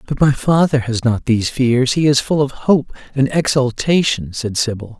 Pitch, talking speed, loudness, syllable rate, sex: 130 Hz, 190 wpm, -16 LUFS, 4.8 syllables/s, male